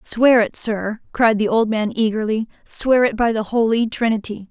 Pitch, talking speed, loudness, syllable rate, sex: 220 Hz, 175 wpm, -18 LUFS, 4.6 syllables/s, female